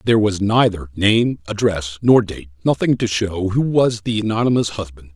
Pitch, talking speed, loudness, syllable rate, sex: 105 Hz, 175 wpm, -18 LUFS, 4.9 syllables/s, male